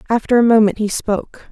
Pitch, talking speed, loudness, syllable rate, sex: 220 Hz, 200 wpm, -15 LUFS, 6.1 syllables/s, female